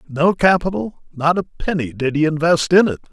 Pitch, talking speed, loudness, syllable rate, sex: 160 Hz, 190 wpm, -17 LUFS, 5.2 syllables/s, male